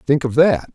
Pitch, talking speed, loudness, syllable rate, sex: 140 Hz, 245 wpm, -16 LUFS, 4.2 syllables/s, male